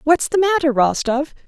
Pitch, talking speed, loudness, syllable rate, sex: 295 Hz, 165 wpm, -17 LUFS, 4.7 syllables/s, female